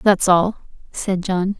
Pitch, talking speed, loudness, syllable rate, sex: 190 Hz, 150 wpm, -19 LUFS, 3.5 syllables/s, female